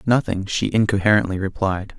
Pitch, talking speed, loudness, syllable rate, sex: 100 Hz, 120 wpm, -20 LUFS, 5.4 syllables/s, male